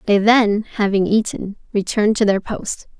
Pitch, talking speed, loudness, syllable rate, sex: 205 Hz, 160 wpm, -18 LUFS, 4.6 syllables/s, female